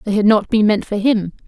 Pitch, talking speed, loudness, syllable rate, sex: 210 Hz, 285 wpm, -16 LUFS, 5.7 syllables/s, female